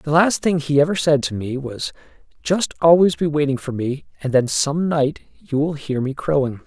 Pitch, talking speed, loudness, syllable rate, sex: 145 Hz, 215 wpm, -19 LUFS, 4.9 syllables/s, male